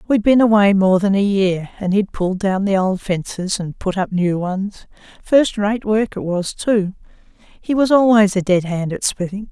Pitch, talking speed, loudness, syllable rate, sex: 200 Hz, 200 wpm, -17 LUFS, 4.4 syllables/s, female